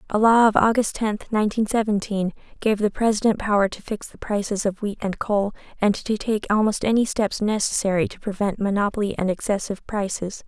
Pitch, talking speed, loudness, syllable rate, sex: 205 Hz, 185 wpm, -22 LUFS, 5.6 syllables/s, female